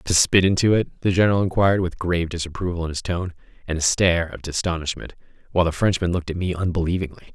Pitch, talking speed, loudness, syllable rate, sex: 90 Hz, 205 wpm, -21 LUFS, 7.2 syllables/s, male